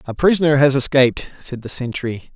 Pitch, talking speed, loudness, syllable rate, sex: 135 Hz, 180 wpm, -17 LUFS, 5.6 syllables/s, male